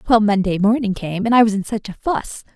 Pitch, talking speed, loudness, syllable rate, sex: 210 Hz, 260 wpm, -18 LUFS, 5.7 syllables/s, female